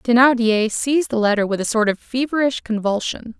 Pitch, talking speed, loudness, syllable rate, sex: 235 Hz, 175 wpm, -19 LUFS, 5.4 syllables/s, female